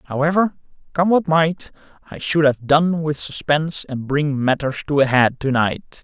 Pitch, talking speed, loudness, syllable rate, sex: 150 Hz, 180 wpm, -19 LUFS, 4.5 syllables/s, male